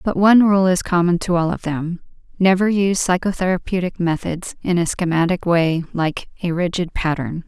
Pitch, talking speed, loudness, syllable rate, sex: 180 Hz, 170 wpm, -19 LUFS, 5.3 syllables/s, female